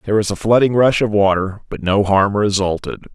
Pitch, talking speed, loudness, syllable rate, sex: 100 Hz, 210 wpm, -16 LUFS, 5.6 syllables/s, male